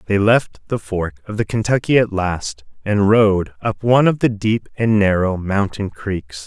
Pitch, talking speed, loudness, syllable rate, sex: 100 Hz, 185 wpm, -18 LUFS, 4.5 syllables/s, male